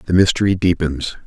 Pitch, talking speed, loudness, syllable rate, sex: 85 Hz, 140 wpm, -17 LUFS, 5.9 syllables/s, male